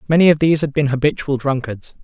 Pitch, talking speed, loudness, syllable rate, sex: 145 Hz, 205 wpm, -17 LUFS, 6.6 syllables/s, male